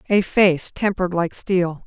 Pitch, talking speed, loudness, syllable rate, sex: 180 Hz, 160 wpm, -20 LUFS, 4.2 syllables/s, female